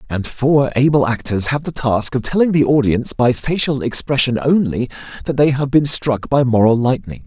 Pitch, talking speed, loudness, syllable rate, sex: 130 Hz, 190 wpm, -16 LUFS, 5.1 syllables/s, male